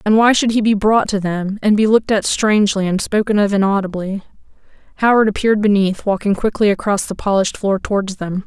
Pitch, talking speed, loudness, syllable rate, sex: 205 Hz, 200 wpm, -16 LUFS, 6.0 syllables/s, female